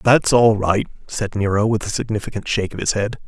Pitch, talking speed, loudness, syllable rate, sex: 105 Hz, 220 wpm, -19 LUFS, 6.0 syllables/s, male